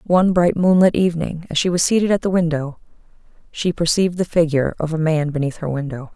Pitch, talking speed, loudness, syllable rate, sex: 165 Hz, 205 wpm, -18 LUFS, 6.2 syllables/s, female